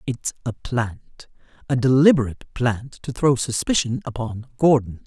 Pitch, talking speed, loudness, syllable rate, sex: 125 Hz, 130 wpm, -21 LUFS, 4.6 syllables/s, female